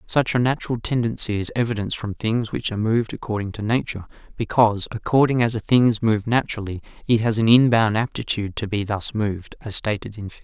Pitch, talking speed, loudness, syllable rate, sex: 110 Hz, 200 wpm, -21 LUFS, 6.4 syllables/s, male